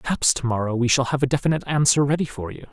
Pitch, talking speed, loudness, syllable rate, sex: 135 Hz, 265 wpm, -21 LUFS, 7.2 syllables/s, male